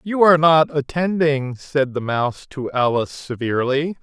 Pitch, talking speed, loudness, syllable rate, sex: 145 Hz, 150 wpm, -19 LUFS, 4.9 syllables/s, male